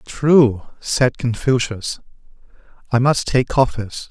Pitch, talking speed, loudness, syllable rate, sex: 125 Hz, 100 wpm, -18 LUFS, 3.6 syllables/s, male